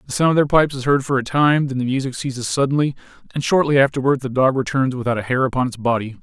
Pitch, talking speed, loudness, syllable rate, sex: 135 Hz, 260 wpm, -19 LUFS, 6.9 syllables/s, male